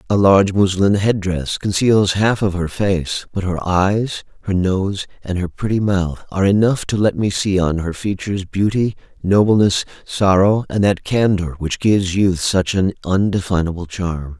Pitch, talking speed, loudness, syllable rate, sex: 95 Hz, 170 wpm, -17 LUFS, 4.6 syllables/s, male